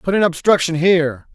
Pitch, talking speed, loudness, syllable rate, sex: 170 Hz, 180 wpm, -16 LUFS, 5.5 syllables/s, male